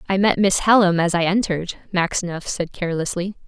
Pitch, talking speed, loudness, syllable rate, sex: 180 Hz, 170 wpm, -20 LUFS, 5.7 syllables/s, female